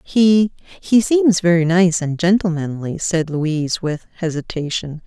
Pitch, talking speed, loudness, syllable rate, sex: 175 Hz, 120 wpm, -17 LUFS, 4.1 syllables/s, female